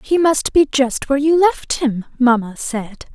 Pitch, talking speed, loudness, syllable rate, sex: 270 Hz, 190 wpm, -17 LUFS, 4.2 syllables/s, female